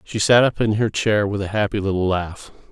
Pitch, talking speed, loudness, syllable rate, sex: 105 Hz, 245 wpm, -19 LUFS, 5.3 syllables/s, male